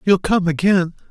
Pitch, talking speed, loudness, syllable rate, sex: 180 Hz, 165 wpm, -17 LUFS, 4.6 syllables/s, male